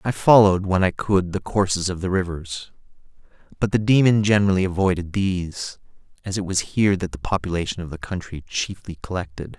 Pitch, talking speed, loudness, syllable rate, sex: 95 Hz, 175 wpm, -21 LUFS, 5.8 syllables/s, male